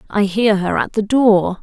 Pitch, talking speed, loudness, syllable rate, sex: 210 Hz, 220 wpm, -16 LUFS, 4.2 syllables/s, female